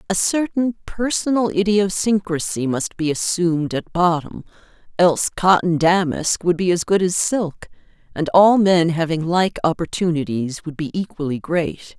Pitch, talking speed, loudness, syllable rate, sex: 175 Hz, 140 wpm, -19 LUFS, 4.5 syllables/s, female